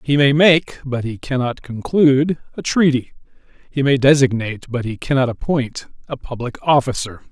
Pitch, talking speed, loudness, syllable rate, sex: 130 Hz, 155 wpm, -18 LUFS, 5.0 syllables/s, male